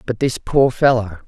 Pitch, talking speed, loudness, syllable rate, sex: 120 Hz, 190 wpm, -17 LUFS, 5.0 syllables/s, female